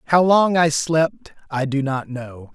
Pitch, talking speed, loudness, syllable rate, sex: 150 Hz, 190 wpm, -19 LUFS, 3.7 syllables/s, male